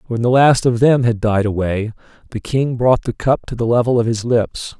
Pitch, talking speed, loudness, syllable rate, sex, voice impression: 120 Hz, 240 wpm, -16 LUFS, 5.1 syllables/s, male, masculine, adult-like, tensed, powerful, hard, clear, fluent, raspy, cool, intellectual, calm, slightly mature, friendly, reassuring, wild, lively, slightly kind